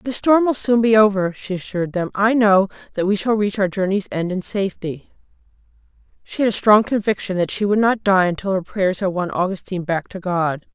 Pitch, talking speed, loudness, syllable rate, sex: 195 Hz, 220 wpm, -19 LUFS, 5.6 syllables/s, female